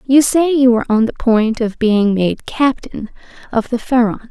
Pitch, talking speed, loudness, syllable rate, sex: 240 Hz, 195 wpm, -15 LUFS, 4.5 syllables/s, female